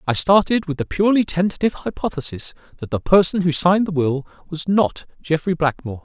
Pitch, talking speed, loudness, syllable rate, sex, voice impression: 170 Hz, 180 wpm, -19 LUFS, 6.1 syllables/s, male, masculine, adult-like, slightly fluent, sincere, slightly calm, slightly unique